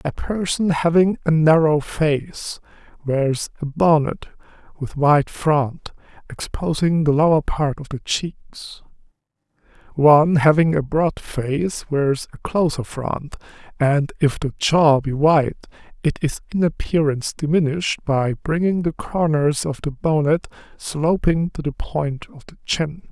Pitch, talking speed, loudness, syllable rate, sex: 150 Hz, 135 wpm, -20 LUFS, 3.9 syllables/s, male